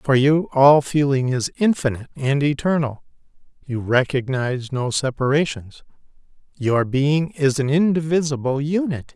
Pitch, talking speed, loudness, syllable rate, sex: 140 Hz, 120 wpm, -20 LUFS, 4.8 syllables/s, male